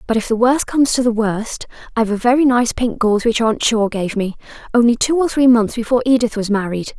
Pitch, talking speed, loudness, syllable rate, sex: 230 Hz, 240 wpm, -16 LUFS, 6.0 syllables/s, female